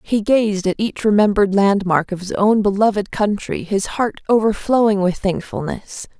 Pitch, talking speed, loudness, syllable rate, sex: 205 Hz, 155 wpm, -17 LUFS, 4.7 syllables/s, female